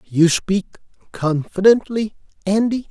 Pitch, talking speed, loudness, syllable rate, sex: 195 Hz, 85 wpm, -18 LUFS, 3.6 syllables/s, male